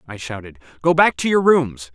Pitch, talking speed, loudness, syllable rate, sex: 130 Hz, 215 wpm, -17 LUFS, 5.2 syllables/s, male